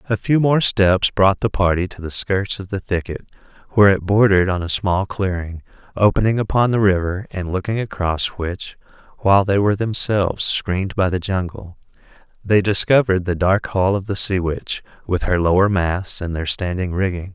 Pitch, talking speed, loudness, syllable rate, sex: 95 Hz, 175 wpm, -19 LUFS, 5.1 syllables/s, male